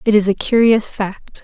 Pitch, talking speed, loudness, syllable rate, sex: 210 Hz, 210 wpm, -16 LUFS, 4.6 syllables/s, female